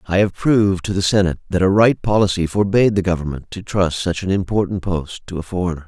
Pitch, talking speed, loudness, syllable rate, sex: 95 Hz, 225 wpm, -18 LUFS, 6.4 syllables/s, male